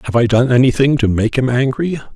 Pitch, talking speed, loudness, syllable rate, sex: 125 Hz, 225 wpm, -14 LUFS, 5.8 syllables/s, male